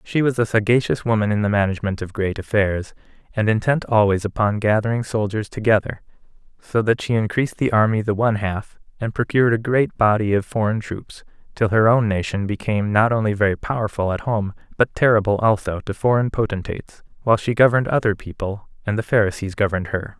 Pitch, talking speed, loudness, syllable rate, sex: 110 Hz, 185 wpm, -20 LUFS, 6.0 syllables/s, male